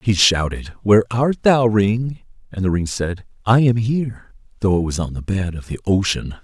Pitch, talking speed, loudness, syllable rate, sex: 105 Hz, 205 wpm, -19 LUFS, 5.0 syllables/s, male